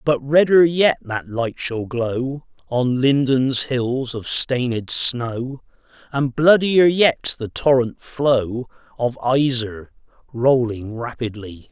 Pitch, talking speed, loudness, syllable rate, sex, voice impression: 130 Hz, 120 wpm, -19 LUFS, 3.2 syllables/s, male, masculine, middle-aged, tensed, powerful, bright, clear, slightly raspy, intellectual, mature, friendly, wild, lively, strict, slightly intense